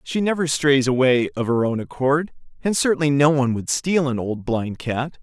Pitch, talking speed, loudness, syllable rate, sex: 135 Hz, 205 wpm, -20 LUFS, 4.8 syllables/s, male